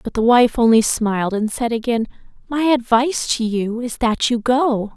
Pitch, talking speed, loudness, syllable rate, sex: 235 Hz, 195 wpm, -18 LUFS, 4.7 syllables/s, female